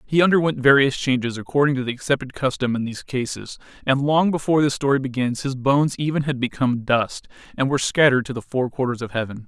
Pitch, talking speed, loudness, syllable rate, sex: 135 Hz, 210 wpm, -21 LUFS, 6.5 syllables/s, male